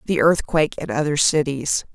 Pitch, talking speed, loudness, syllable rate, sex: 145 Hz, 155 wpm, -20 LUFS, 5.2 syllables/s, female